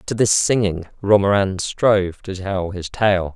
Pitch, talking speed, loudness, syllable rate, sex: 100 Hz, 160 wpm, -19 LUFS, 4.1 syllables/s, male